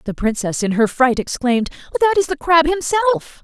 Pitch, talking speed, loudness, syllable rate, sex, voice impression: 295 Hz, 190 wpm, -17 LUFS, 6.0 syllables/s, female, very feminine, slightly young, adult-like, very thin, tensed, slightly powerful, very bright, hard, very clear, fluent, slightly cute, slightly cool, very intellectual, refreshing, sincere, calm, slightly mature, friendly, reassuring, very unique, elegant, slightly sweet, lively, kind, slightly modest